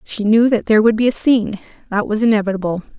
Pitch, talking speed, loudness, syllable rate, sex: 215 Hz, 220 wpm, -16 LUFS, 6.9 syllables/s, female